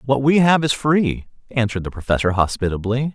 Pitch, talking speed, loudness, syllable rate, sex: 125 Hz, 170 wpm, -19 LUFS, 5.7 syllables/s, male